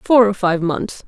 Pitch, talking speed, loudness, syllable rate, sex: 195 Hz, 225 wpm, -17 LUFS, 4.2 syllables/s, female